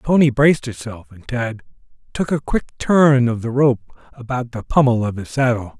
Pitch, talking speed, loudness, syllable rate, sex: 125 Hz, 195 wpm, -18 LUFS, 5.3 syllables/s, male